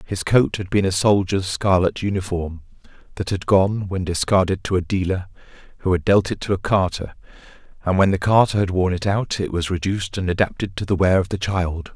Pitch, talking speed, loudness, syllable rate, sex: 95 Hz, 210 wpm, -20 LUFS, 5.5 syllables/s, male